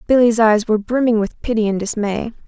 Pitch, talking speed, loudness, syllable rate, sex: 220 Hz, 195 wpm, -17 LUFS, 6.0 syllables/s, female